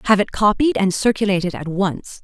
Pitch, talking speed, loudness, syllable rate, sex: 200 Hz, 215 wpm, -18 LUFS, 5.9 syllables/s, female